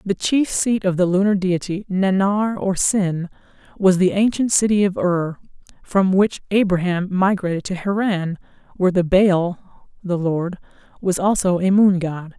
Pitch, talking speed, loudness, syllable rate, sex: 190 Hz, 155 wpm, -19 LUFS, 4.6 syllables/s, female